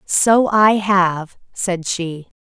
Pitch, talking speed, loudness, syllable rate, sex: 190 Hz, 125 wpm, -16 LUFS, 2.4 syllables/s, female